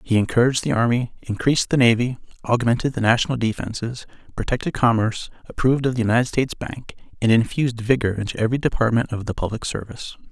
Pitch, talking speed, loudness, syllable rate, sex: 120 Hz, 170 wpm, -21 LUFS, 6.8 syllables/s, male